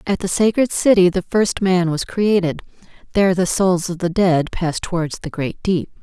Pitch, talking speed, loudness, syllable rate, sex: 185 Hz, 200 wpm, -18 LUFS, 4.9 syllables/s, female